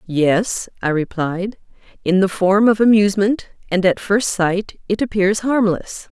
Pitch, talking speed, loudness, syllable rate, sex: 195 Hz, 145 wpm, -17 LUFS, 4.1 syllables/s, female